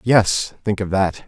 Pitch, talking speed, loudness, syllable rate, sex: 100 Hz, 140 wpm, -19 LUFS, 3.7 syllables/s, male